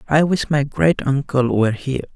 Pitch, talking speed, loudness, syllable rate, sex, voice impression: 140 Hz, 195 wpm, -18 LUFS, 5.4 syllables/s, male, masculine, slightly adult-like, slightly halting, slightly calm, unique